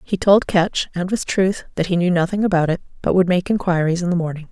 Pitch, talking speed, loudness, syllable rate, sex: 180 Hz, 225 wpm, -19 LUFS, 5.9 syllables/s, female